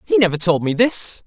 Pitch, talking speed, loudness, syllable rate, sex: 175 Hz, 235 wpm, -17 LUFS, 5.2 syllables/s, male